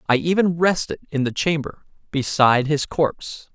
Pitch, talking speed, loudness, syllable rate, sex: 150 Hz, 150 wpm, -20 LUFS, 5.0 syllables/s, male